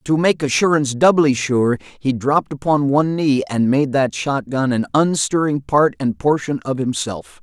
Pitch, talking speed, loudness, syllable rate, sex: 140 Hz, 170 wpm, -18 LUFS, 4.7 syllables/s, male